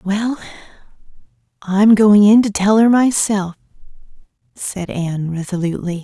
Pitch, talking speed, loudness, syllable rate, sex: 200 Hz, 110 wpm, -15 LUFS, 4.6 syllables/s, female